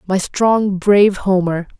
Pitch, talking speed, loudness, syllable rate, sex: 195 Hz, 135 wpm, -15 LUFS, 3.9 syllables/s, female